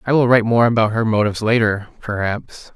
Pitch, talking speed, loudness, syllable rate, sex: 110 Hz, 195 wpm, -17 LUFS, 6.0 syllables/s, male